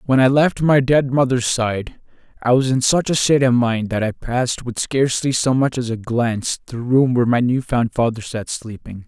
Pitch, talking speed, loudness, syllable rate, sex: 125 Hz, 225 wpm, -18 LUFS, 5.1 syllables/s, male